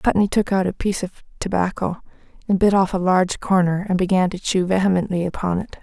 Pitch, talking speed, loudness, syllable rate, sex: 190 Hz, 205 wpm, -20 LUFS, 6.2 syllables/s, female